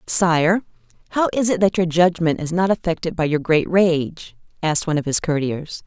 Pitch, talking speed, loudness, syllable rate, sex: 170 Hz, 195 wpm, -19 LUFS, 5.1 syllables/s, female